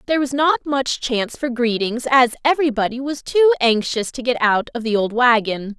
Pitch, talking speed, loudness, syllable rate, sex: 250 Hz, 195 wpm, -18 LUFS, 5.4 syllables/s, female